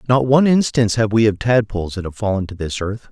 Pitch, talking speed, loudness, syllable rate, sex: 110 Hz, 250 wpm, -17 LUFS, 6.5 syllables/s, male